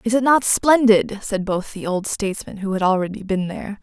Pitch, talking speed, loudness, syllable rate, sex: 205 Hz, 220 wpm, -19 LUFS, 5.4 syllables/s, female